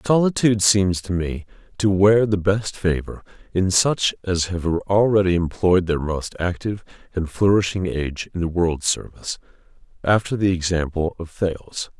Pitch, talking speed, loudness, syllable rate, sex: 95 Hz, 150 wpm, -21 LUFS, 4.8 syllables/s, male